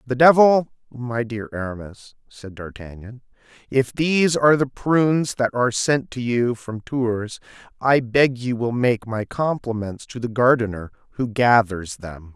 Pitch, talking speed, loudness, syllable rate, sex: 120 Hz, 155 wpm, -20 LUFS, 4.3 syllables/s, male